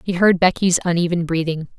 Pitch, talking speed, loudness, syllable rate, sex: 175 Hz, 170 wpm, -18 LUFS, 5.8 syllables/s, female